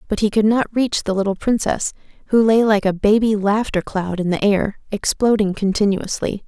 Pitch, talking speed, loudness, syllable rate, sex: 205 Hz, 185 wpm, -18 LUFS, 5.0 syllables/s, female